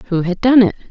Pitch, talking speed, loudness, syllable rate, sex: 210 Hz, 265 wpm, -14 LUFS, 5.5 syllables/s, female